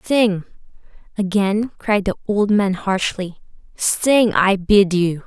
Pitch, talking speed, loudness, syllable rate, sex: 200 Hz, 125 wpm, -18 LUFS, 3.3 syllables/s, female